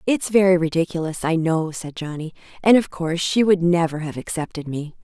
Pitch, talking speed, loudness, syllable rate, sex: 170 Hz, 190 wpm, -20 LUFS, 5.5 syllables/s, female